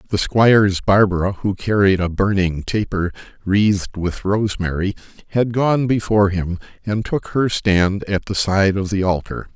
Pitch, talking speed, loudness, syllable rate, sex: 100 Hz, 155 wpm, -18 LUFS, 4.6 syllables/s, male